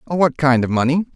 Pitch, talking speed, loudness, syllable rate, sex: 145 Hz, 210 wpm, -17 LUFS, 5.3 syllables/s, male